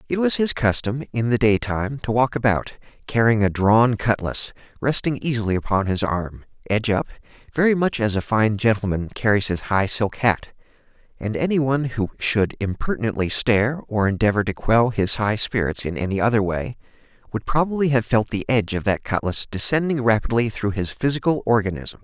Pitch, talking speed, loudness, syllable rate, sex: 115 Hz, 175 wpm, -21 LUFS, 5.5 syllables/s, male